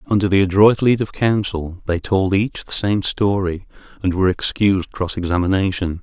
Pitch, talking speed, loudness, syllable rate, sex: 95 Hz, 170 wpm, -18 LUFS, 5.2 syllables/s, male